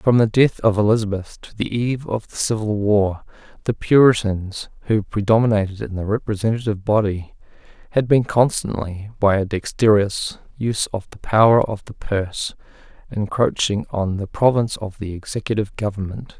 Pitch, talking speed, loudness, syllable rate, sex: 105 Hz, 150 wpm, -20 LUFS, 5.3 syllables/s, male